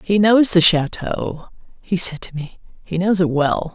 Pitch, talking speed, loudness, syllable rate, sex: 175 Hz, 190 wpm, -17 LUFS, 4.3 syllables/s, female